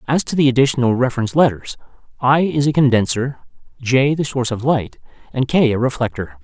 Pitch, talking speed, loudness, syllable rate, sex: 130 Hz, 175 wpm, -17 LUFS, 6.1 syllables/s, male